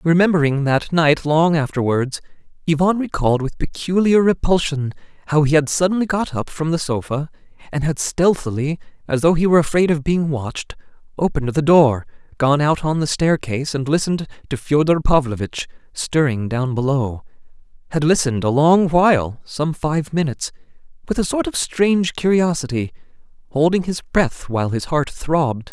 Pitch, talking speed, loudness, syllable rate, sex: 155 Hz, 150 wpm, -18 LUFS, 5.3 syllables/s, male